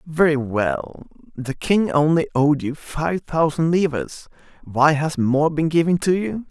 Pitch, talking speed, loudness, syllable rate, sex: 155 Hz, 155 wpm, -20 LUFS, 3.8 syllables/s, male